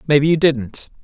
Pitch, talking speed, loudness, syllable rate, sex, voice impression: 145 Hz, 175 wpm, -16 LUFS, 5.1 syllables/s, male, very masculine, very middle-aged, very thick, tensed, slightly weak, slightly bright, slightly soft, clear, slightly fluent, slightly raspy, slightly cool, intellectual, refreshing, slightly sincere, calm, slightly mature, friendly, very reassuring, unique, elegant, slightly wild, sweet, lively, kind, slightly modest